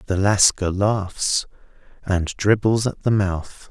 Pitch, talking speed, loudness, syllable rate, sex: 100 Hz, 130 wpm, -20 LUFS, 3.3 syllables/s, male